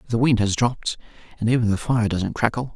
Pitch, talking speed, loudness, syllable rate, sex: 115 Hz, 195 wpm, -22 LUFS, 6.2 syllables/s, male